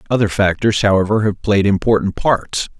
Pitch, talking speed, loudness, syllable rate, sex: 100 Hz, 150 wpm, -16 LUFS, 5.2 syllables/s, male